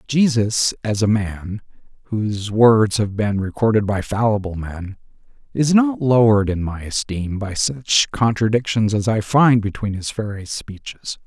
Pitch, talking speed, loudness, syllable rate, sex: 110 Hz, 150 wpm, -19 LUFS, 4.3 syllables/s, male